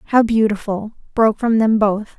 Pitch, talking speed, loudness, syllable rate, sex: 215 Hz, 165 wpm, -17 LUFS, 5.1 syllables/s, female